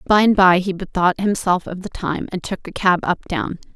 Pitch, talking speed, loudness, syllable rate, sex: 185 Hz, 225 wpm, -19 LUFS, 5.0 syllables/s, female